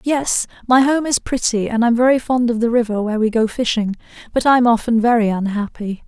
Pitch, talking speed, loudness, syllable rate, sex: 235 Hz, 210 wpm, -17 LUFS, 5.6 syllables/s, female